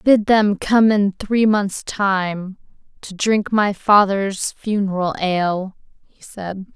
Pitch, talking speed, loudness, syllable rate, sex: 200 Hz, 135 wpm, -18 LUFS, 3.5 syllables/s, female